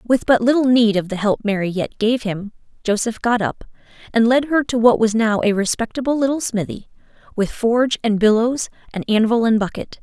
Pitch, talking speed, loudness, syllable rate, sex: 225 Hz, 200 wpm, -18 LUFS, 5.4 syllables/s, female